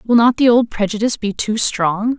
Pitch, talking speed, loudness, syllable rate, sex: 220 Hz, 220 wpm, -16 LUFS, 5.1 syllables/s, female